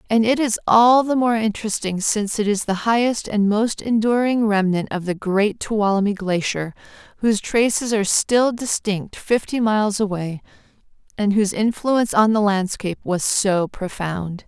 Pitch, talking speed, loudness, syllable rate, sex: 210 Hz, 160 wpm, -19 LUFS, 4.8 syllables/s, female